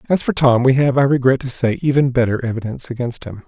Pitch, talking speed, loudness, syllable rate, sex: 130 Hz, 240 wpm, -17 LUFS, 6.4 syllables/s, male